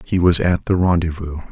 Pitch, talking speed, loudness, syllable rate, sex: 85 Hz, 200 wpm, -17 LUFS, 5.3 syllables/s, male